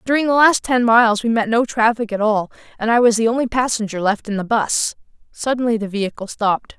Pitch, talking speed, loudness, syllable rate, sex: 225 Hz, 220 wpm, -17 LUFS, 6.0 syllables/s, female